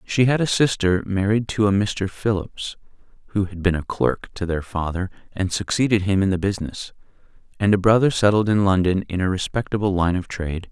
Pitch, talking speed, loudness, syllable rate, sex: 100 Hz, 195 wpm, -21 LUFS, 5.5 syllables/s, male